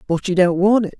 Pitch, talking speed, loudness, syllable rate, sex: 190 Hz, 300 wpm, -16 LUFS, 6.0 syllables/s, male